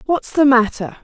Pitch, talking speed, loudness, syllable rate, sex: 260 Hz, 175 wpm, -15 LUFS, 4.7 syllables/s, female